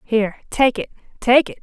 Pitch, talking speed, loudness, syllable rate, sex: 240 Hz, 150 wpm, -18 LUFS, 5.4 syllables/s, female